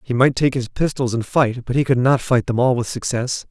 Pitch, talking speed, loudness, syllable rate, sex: 125 Hz, 275 wpm, -19 LUFS, 5.4 syllables/s, male